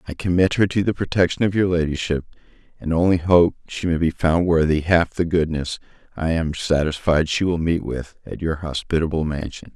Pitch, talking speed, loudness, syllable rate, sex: 85 Hz, 190 wpm, -20 LUFS, 5.3 syllables/s, male